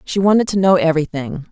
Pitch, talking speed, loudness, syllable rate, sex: 175 Hz, 200 wpm, -16 LUFS, 6.5 syllables/s, female